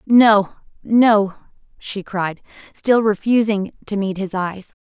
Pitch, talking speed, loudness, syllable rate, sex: 205 Hz, 125 wpm, -18 LUFS, 3.5 syllables/s, female